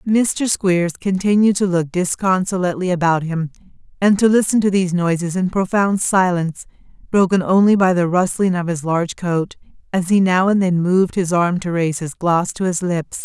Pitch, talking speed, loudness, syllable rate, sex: 180 Hz, 185 wpm, -17 LUFS, 5.2 syllables/s, female